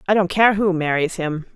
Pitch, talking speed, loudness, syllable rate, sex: 180 Hz, 230 wpm, -19 LUFS, 5.2 syllables/s, female